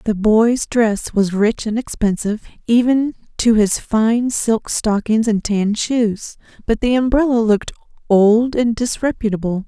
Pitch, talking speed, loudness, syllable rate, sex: 225 Hz, 145 wpm, -17 LUFS, 4.1 syllables/s, female